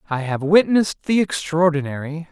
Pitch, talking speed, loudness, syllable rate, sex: 165 Hz, 130 wpm, -19 LUFS, 5.2 syllables/s, male